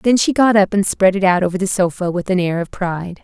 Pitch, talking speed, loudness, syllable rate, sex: 190 Hz, 295 wpm, -16 LUFS, 6.0 syllables/s, female